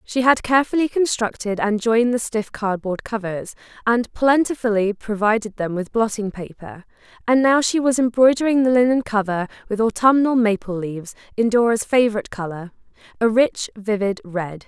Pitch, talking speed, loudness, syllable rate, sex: 220 Hz, 150 wpm, -19 LUFS, 5.2 syllables/s, female